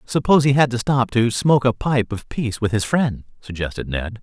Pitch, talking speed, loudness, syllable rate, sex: 120 Hz, 225 wpm, -19 LUFS, 5.5 syllables/s, male